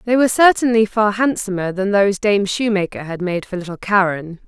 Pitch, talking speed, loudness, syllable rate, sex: 200 Hz, 190 wpm, -17 LUFS, 5.6 syllables/s, female